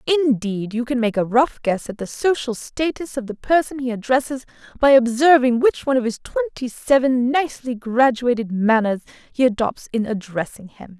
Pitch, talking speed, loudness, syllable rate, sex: 245 Hz, 175 wpm, -20 LUFS, 5.0 syllables/s, female